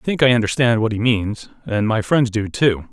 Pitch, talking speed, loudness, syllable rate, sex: 115 Hz, 225 wpm, -18 LUFS, 5.4 syllables/s, male